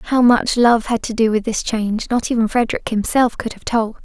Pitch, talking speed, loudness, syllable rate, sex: 230 Hz, 240 wpm, -17 LUFS, 5.3 syllables/s, female